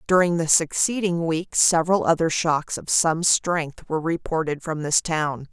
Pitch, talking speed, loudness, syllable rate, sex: 165 Hz, 165 wpm, -21 LUFS, 4.5 syllables/s, female